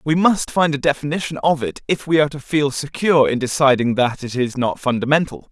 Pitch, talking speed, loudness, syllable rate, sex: 140 Hz, 220 wpm, -18 LUFS, 5.8 syllables/s, male